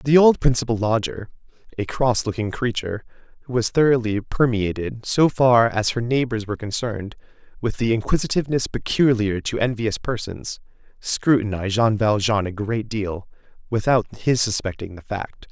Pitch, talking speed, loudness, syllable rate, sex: 115 Hz, 145 wpm, -21 LUFS, 5.1 syllables/s, male